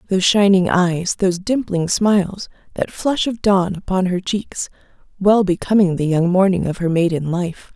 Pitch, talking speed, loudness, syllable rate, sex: 185 Hz, 170 wpm, -18 LUFS, 4.8 syllables/s, female